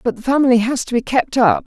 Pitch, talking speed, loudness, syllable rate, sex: 240 Hz, 290 wpm, -16 LUFS, 6.4 syllables/s, female